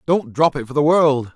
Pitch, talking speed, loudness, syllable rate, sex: 145 Hz, 265 wpm, -17 LUFS, 5.0 syllables/s, male